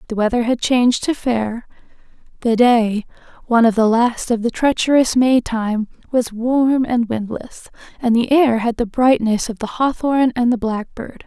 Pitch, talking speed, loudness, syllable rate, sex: 235 Hz, 175 wpm, -17 LUFS, 4.5 syllables/s, female